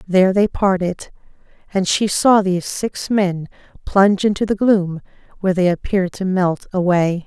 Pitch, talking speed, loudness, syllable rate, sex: 190 Hz, 155 wpm, -17 LUFS, 4.9 syllables/s, female